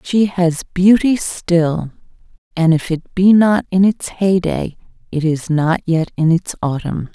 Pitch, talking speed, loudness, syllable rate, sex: 175 Hz, 160 wpm, -16 LUFS, 3.9 syllables/s, female